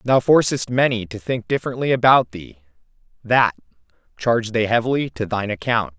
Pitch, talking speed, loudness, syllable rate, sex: 110 Hz, 150 wpm, -19 LUFS, 5.5 syllables/s, male